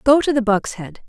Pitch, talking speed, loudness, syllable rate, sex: 245 Hz, 280 wpm, -17 LUFS, 5.4 syllables/s, female